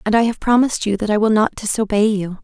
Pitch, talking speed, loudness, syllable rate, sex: 215 Hz, 270 wpm, -17 LUFS, 6.5 syllables/s, female